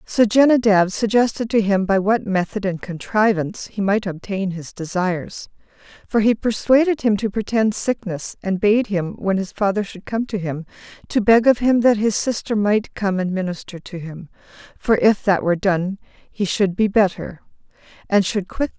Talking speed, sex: 195 wpm, female